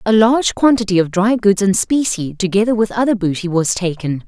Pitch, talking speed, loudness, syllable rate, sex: 200 Hz, 195 wpm, -15 LUFS, 5.6 syllables/s, female